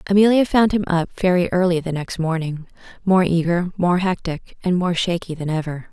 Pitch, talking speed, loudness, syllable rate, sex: 175 Hz, 180 wpm, -20 LUFS, 5.3 syllables/s, female